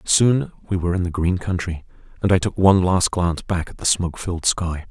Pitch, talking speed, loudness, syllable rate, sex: 90 Hz, 230 wpm, -20 LUFS, 6.0 syllables/s, male